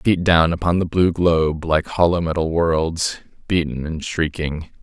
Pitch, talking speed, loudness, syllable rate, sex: 85 Hz, 160 wpm, -19 LUFS, 4.3 syllables/s, male